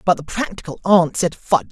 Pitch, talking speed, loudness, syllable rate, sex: 165 Hz, 210 wpm, -19 LUFS, 5.8 syllables/s, male